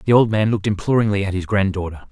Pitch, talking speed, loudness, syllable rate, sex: 100 Hz, 225 wpm, -19 LUFS, 7.1 syllables/s, male